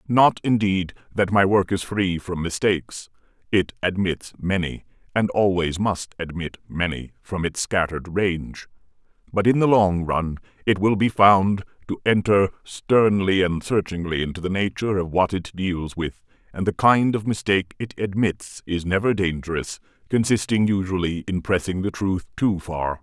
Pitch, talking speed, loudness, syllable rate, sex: 95 Hz, 160 wpm, -22 LUFS, 4.7 syllables/s, male